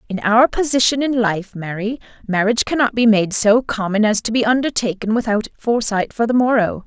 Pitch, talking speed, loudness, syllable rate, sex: 220 Hz, 185 wpm, -17 LUFS, 5.5 syllables/s, female